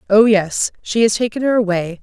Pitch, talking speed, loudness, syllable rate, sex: 210 Hz, 205 wpm, -16 LUFS, 5.2 syllables/s, female